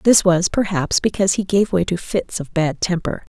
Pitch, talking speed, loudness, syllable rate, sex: 185 Hz, 215 wpm, -19 LUFS, 5.1 syllables/s, female